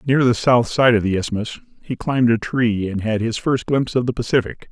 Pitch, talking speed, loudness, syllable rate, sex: 120 Hz, 240 wpm, -19 LUFS, 5.6 syllables/s, male